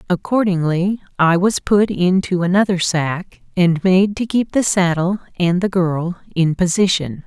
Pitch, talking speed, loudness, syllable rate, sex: 180 Hz, 150 wpm, -17 LUFS, 4.2 syllables/s, female